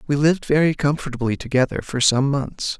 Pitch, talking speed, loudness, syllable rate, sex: 140 Hz, 170 wpm, -20 LUFS, 5.7 syllables/s, male